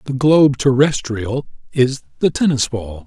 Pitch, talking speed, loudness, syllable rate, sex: 135 Hz, 135 wpm, -17 LUFS, 4.4 syllables/s, male